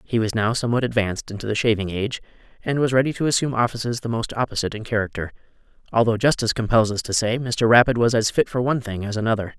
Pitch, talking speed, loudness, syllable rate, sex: 115 Hz, 225 wpm, -21 LUFS, 7.2 syllables/s, male